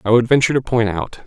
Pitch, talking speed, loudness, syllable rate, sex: 120 Hz, 285 wpm, -17 LUFS, 6.8 syllables/s, male